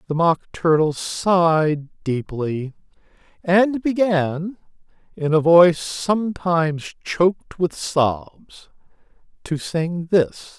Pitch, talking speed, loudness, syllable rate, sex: 165 Hz, 95 wpm, -20 LUFS, 3.1 syllables/s, male